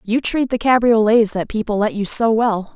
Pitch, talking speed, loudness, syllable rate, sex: 220 Hz, 220 wpm, -16 LUFS, 4.9 syllables/s, female